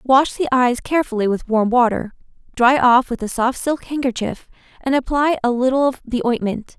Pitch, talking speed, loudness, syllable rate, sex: 250 Hz, 185 wpm, -18 LUFS, 5.1 syllables/s, female